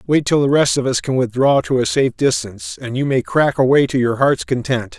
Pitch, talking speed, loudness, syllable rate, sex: 130 Hz, 255 wpm, -16 LUFS, 5.6 syllables/s, male